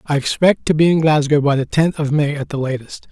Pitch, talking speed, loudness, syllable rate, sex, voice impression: 150 Hz, 270 wpm, -16 LUFS, 5.7 syllables/s, male, masculine, old, slightly weak, halting, raspy, mature, friendly, reassuring, slightly wild, slightly strict, modest